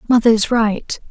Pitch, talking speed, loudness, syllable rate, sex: 225 Hz, 165 wpm, -16 LUFS, 4.7 syllables/s, female